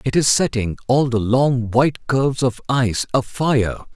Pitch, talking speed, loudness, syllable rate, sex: 125 Hz, 165 wpm, -19 LUFS, 4.9 syllables/s, male